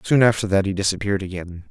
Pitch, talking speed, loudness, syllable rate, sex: 100 Hz, 210 wpm, -20 LUFS, 7.0 syllables/s, male